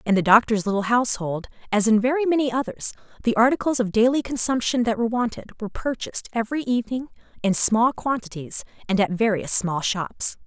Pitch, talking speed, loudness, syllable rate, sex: 225 Hz, 170 wpm, -22 LUFS, 6.0 syllables/s, female